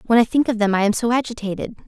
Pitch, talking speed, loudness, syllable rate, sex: 225 Hz, 290 wpm, -19 LUFS, 7.3 syllables/s, female